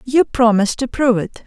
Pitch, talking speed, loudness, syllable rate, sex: 235 Hz, 205 wpm, -16 LUFS, 5.9 syllables/s, female